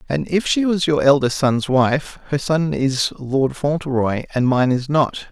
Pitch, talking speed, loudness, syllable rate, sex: 140 Hz, 190 wpm, -18 LUFS, 4.1 syllables/s, male